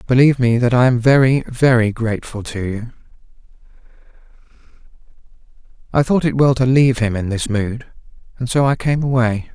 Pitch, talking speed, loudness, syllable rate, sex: 125 Hz, 155 wpm, -16 LUFS, 5.6 syllables/s, male